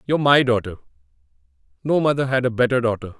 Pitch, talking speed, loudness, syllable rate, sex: 130 Hz, 170 wpm, -19 LUFS, 7.1 syllables/s, male